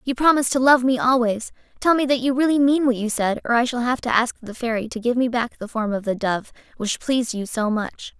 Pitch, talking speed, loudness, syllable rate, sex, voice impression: 240 Hz, 270 wpm, -21 LUFS, 5.8 syllables/s, female, feminine, slightly young, slightly bright, cute, slightly refreshing, friendly